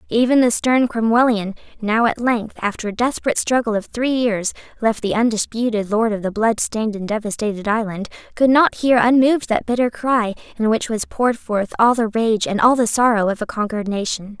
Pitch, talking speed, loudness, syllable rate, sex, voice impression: 225 Hz, 195 wpm, -18 LUFS, 5.5 syllables/s, female, very feminine, gender-neutral, very young, very thin, tensed, slightly weak, very bright, very hard, very clear, very fluent, slightly raspy, very cute, very intellectual, refreshing, sincere, slightly calm, very friendly, very reassuring, very unique, elegant, very sweet, very lively, very kind, slightly sharp, very light